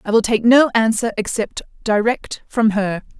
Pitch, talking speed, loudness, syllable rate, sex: 220 Hz, 170 wpm, -18 LUFS, 4.5 syllables/s, female